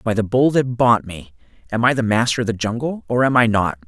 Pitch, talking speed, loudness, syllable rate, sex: 110 Hz, 265 wpm, -18 LUFS, 5.7 syllables/s, male